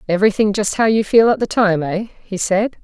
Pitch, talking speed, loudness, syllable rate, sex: 205 Hz, 235 wpm, -16 LUFS, 5.5 syllables/s, female